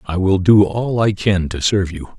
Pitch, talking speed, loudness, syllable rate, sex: 95 Hz, 245 wpm, -16 LUFS, 5.0 syllables/s, male